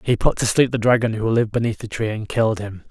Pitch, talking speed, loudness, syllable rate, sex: 110 Hz, 290 wpm, -20 LUFS, 6.5 syllables/s, male